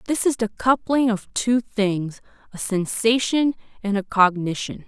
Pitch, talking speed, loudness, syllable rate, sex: 220 Hz, 135 wpm, -22 LUFS, 4.1 syllables/s, female